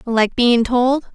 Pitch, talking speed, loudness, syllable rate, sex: 240 Hz, 160 wpm, -16 LUFS, 2.9 syllables/s, female